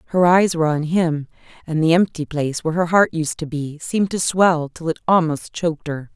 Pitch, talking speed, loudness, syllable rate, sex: 165 Hz, 225 wpm, -19 LUFS, 5.6 syllables/s, female